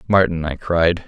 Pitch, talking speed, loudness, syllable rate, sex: 85 Hz, 170 wpm, -18 LUFS, 4.5 syllables/s, male